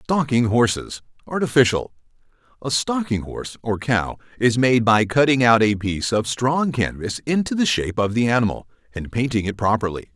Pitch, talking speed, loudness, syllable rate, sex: 120 Hz, 155 wpm, -20 LUFS, 5.3 syllables/s, male